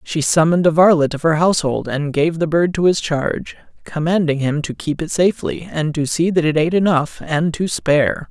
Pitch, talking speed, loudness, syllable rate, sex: 160 Hz, 215 wpm, -17 LUFS, 5.4 syllables/s, male